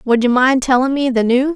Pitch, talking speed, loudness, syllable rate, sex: 255 Hz, 270 wpm, -14 LUFS, 5.5 syllables/s, female